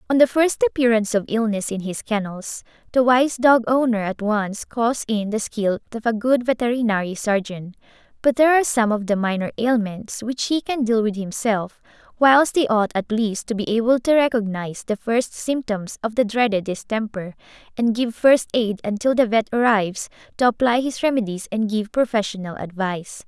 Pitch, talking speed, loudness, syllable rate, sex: 225 Hz, 185 wpm, -20 LUFS, 5.1 syllables/s, female